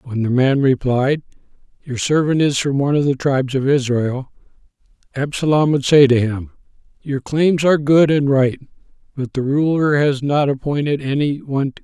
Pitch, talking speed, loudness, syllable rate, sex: 140 Hz, 180 wpm, -17 LUFS, 5.2 syllables/s, male